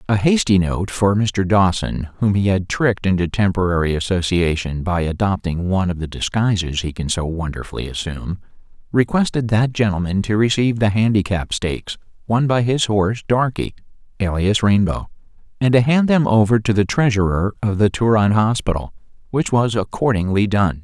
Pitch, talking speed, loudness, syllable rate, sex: 100 Hz, 160 wpm, -18 LUFS, 5.3 syllables/s, male